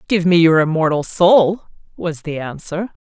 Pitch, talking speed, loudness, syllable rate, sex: 170 Hz, 160 wpm, -16 LUFS, 4.4 syllables/s, female